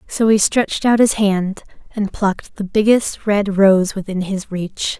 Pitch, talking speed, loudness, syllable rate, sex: 200 Hz, 180 wpm, -17 LUFS, 4.2 syllables/s, female